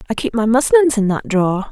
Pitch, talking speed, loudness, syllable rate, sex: 215 Hz, 245 wpm, -15 LUFS, 6.1 syllables/s, female